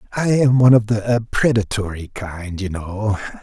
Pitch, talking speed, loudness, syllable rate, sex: 110 Hz, 160 wpm, -18 LUFS, 4.6 syllables/s, male